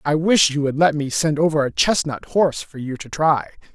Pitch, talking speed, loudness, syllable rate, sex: 150 Hz, 240 wpm, -19 LUFS, 5.3 syllables/s, male